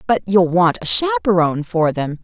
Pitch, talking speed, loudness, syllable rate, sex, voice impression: 185 Hz, 190 wpm, -16 LUFS, 5.0 syllables/s, female, very feminine, adult-like, slightly middle-aged, slightly thin, very tensed, powerful, bright, slightly hard, very clear, fluent, cool, intellectual, slightly refreshing, sincere, calm, slightly friendly, reassuring, elegant, slightly sweet, lively, strict, sharp